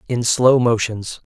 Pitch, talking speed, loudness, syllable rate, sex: 120 Hz, 135 wpm, -16 LUFS, 3.7 syllables/s, male